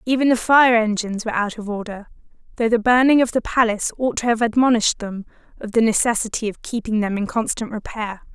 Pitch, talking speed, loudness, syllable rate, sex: 225 Hz, 200 wpm, -19 LUFS, 6.3 syllables/s, female